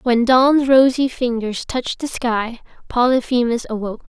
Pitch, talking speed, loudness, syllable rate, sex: 245 Hz, 130 wpm, -17 LUFS, 4.7 syllables/s, female